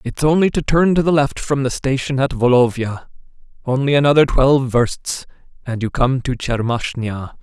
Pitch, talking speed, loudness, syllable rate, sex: 135 Hz, 170 wpm, -17 LUFS, 4.9 syllables/s, male